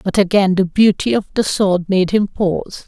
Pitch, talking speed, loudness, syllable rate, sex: 195 Hz, 210 wpm, -16 LUFS, 4.8 syllables/s, female